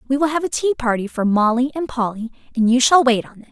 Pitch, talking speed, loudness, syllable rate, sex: 250 Hz, 275 wpm, -18 LUFS, 6.5 syllables/s, female